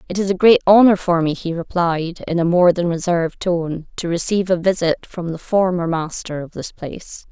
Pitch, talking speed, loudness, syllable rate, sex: 175 Hz, 215 wpm, -18 LUFS, 5.2 syllables/s, female